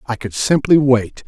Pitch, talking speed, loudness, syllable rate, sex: 120 Hz, 190 wpm, -15 LUFS, 4.4 syllables/s, male